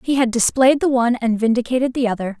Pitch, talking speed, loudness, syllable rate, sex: 245 Hz, 225 wpm, -17 LUFS, 6.6 syllables/s, female